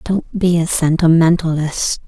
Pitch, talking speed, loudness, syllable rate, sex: 165 Hz, 115 wpm, -15 LUFS, 4.2 syllables/s, female